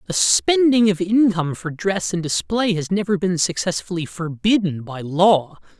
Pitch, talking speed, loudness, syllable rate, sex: 180 Hz, 155 wpm, -19 LUFS, 4.6 syllables/s, male